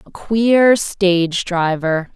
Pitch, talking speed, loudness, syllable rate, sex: 190 Hz, 110 wpm, -16 LUFS, 3.0 syllables/s, female